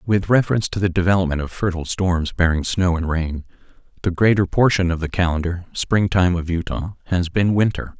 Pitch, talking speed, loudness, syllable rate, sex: 90 Hz, 180 wpm, -20 LUFS, 5.8 syllables/s, male